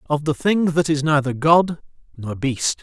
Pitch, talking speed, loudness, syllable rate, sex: 150 Hz, 190 wpm, -19 LUFS, 4.4 syllables/s, male